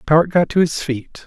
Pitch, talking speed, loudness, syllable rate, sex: 155 Hz, 240 wpm, -18 LUFS, 5.3 syllables/s, male